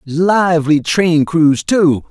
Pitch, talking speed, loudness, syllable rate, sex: 160 Hz, 115 wpm, -13 LUFS, 3.1 syllables/s, male